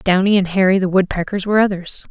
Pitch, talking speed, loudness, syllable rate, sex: 190 Hz, 200 wpm, -16 LUFS, 6.6 syllables/s, female